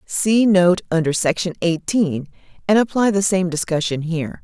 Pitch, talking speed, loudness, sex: 180 Hz, 150 wpm, -18 LUFS, female